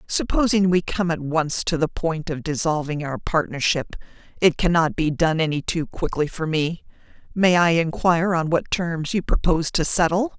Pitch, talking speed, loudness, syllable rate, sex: 165 Hz, 180 wpm, -21 LUFS, 4.9 syllables/s, female